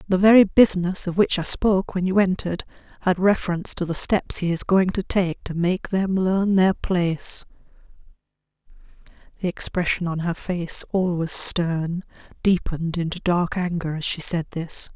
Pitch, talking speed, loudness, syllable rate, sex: 180 Hz, 170 wpm, -21 LUFS, 4.4 syllables/s, female